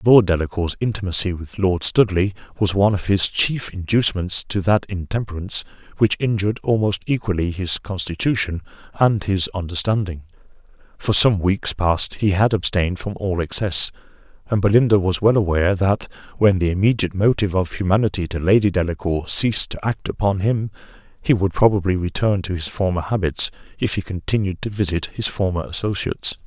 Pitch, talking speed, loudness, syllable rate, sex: 95 Hz, 160 wpm, -20 LUFS, 5.5 syllables/s, male